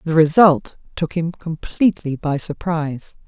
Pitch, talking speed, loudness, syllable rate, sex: 160 Hz, 130 wpm, -19 LUFS, 4.5 syllables/s, female